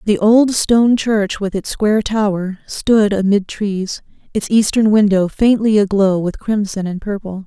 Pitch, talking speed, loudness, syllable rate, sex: 205 Hz, 160 wpm, -15 LUFS, 4.3 syllables/s, female